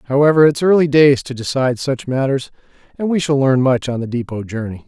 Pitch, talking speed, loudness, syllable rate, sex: 135 Hz, 210 wpm, -16 LUFS, 5.7 syllables/s, male